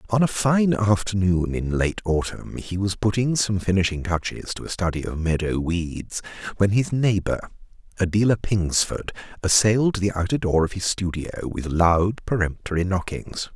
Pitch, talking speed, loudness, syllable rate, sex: 95 Hz, 155 wpm, -23 LUFS, 4.7 syllables/s, male